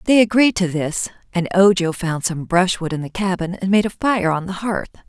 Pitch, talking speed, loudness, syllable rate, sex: 185 Hz, 225 wpm, -19 LUFS, 5.1 syllables/s, female